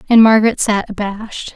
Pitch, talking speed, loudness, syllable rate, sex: 215 Hz, 155 wpm, -14 LUFS, 6.0 syllables/s, female